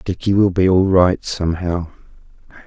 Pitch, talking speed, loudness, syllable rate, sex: 90 Hz, 135 wpm, -16 LUFS, 4.9 syllables/s, male